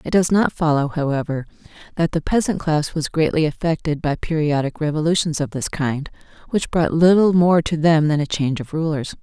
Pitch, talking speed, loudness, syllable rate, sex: 155 Hz, 190 wpm, -19 LUFS, 5.4 syllables/s, female